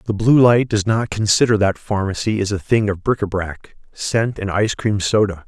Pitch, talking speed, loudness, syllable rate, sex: 105 Hz, 220 wpm, -18 LUFS, 5.1 syllables/s, male